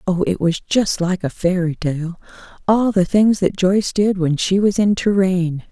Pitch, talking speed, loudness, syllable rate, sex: 185 Hz, 200 wpm, -18 LUFS, 4.6 syllables/s, female